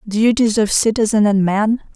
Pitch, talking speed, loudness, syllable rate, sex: 215 Hz, 155 wpm, -15 LUFS, 4.7 syllables/s, female